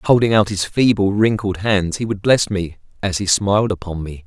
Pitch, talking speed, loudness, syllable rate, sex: 100 Hz, 210 wpm, -18 LUFS, 5.1 syllables/s, male